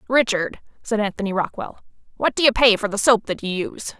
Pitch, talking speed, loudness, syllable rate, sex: 215 Hz, 210 wpm, -20 LUFS, 6.0 syllables/s, female